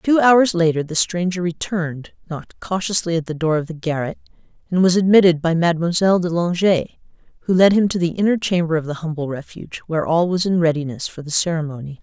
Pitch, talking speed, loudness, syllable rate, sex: 170 Hz, 200 wpm, -18 LUFS, 6.2 syllables/s, female